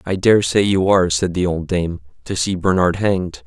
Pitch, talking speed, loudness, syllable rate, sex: 90 Hz, 210 wpm, -17 LUFS, 5.5 syllables/s, male